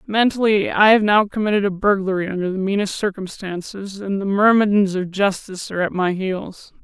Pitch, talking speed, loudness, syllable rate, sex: 195 Hz, 175 wpm, -19 LUFS, 5.4 syllables/s, female